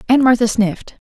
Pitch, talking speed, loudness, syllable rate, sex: 230 Hz, 165 wpm, -15 LUFS, 6.0 syllables/s, female